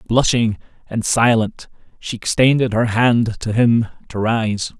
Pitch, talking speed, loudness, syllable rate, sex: 115 Hz, 140 wpm, -17 LUFS, 3.9 syllables/s, male